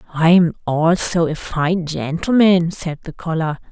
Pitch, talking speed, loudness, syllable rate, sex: 165 Hz, 145 wpm, -17 LUFS, 4.1 syllables/s, female